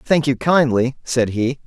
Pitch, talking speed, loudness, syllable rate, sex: 130 Hz, 180 wpm, -18 LUFS, 4.1 syllables/s, male